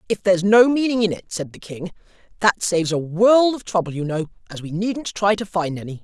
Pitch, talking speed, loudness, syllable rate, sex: 190 Hz, 240 wpm, -19 LUFS, 5.6 syllables/s, male